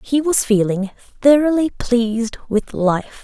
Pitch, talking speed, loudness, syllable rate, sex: 240 Hz, 130 wpm, -17 LUFS, 4.0 syllables/s, female